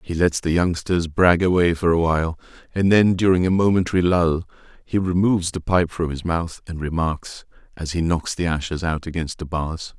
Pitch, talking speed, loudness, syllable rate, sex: 85 Hz, 200 wpm, -21 LUFS, 5.1 syllables/s, male